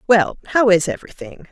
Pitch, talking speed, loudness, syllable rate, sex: 200 Hz, 160 wpm, -17 LUFS, 6.0 syllables/s, female